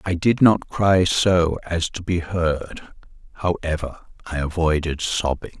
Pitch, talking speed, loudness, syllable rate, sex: 85 Hz, 140 wpm, -21 LUFS, 3.9 syllables/s, male